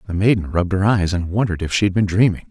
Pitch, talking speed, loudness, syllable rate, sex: 95 Hz, 285 wpm, -18 LUFS, 7.3 syllables/s, male